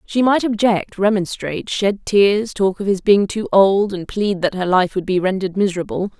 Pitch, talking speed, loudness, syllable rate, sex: 195 Hz, 205 wpm, -17 LUFS, 5.1 syllables/s, female